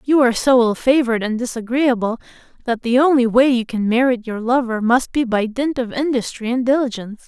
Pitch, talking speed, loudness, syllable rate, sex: 245 Hz, 200 wpm, -18 LUFS, 5.7 syllables/s, female